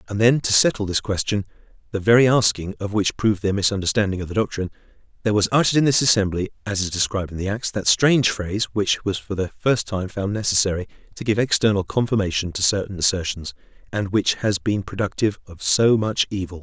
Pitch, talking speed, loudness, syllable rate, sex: 100 Hz, 200 wpm, -21 LUFS, 6.3 syllables/s, male